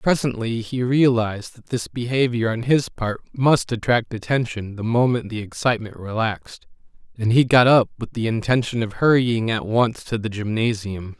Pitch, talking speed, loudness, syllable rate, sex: 115 Hz, 165 wpm, -21 LUFS, 4.9 syllables/s, male